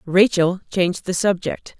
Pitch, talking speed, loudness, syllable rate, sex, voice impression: 180 Hz, 135 wpm, -20 LUFS, 4.4 syllables/s, female, feminine, middle-aged, clear, fluent, intellectual, elegant, lively, slightly strict, slightly sharp